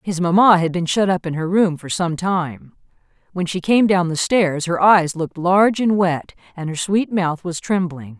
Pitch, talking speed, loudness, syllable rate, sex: 175 Hz, 220 wpm, -18 LUFS, 4.7 syllables/s, female